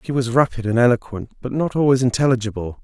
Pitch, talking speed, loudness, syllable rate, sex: 125 Hz, 190 wpm, -19 LUFS, 6.5 syllables/s, male